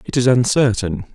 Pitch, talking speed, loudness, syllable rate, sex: 120 Hz, 155 wpm, -17 LUFS, 5.4 syllables/s, male